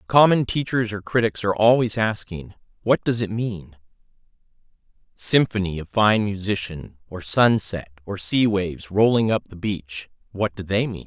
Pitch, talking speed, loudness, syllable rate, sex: 105 Hz, 145 wpm, -22 LUFS, 4.7 syllables/s, male